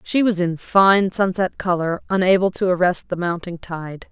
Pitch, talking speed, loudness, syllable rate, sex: 180 Hz, 175 wpm, -19 LUFS, 4.6 syllables/s, female